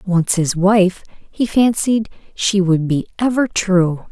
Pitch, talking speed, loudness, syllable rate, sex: 195 Hz, 145 wpm, -16 LUFS, 3.5 syllables/s, female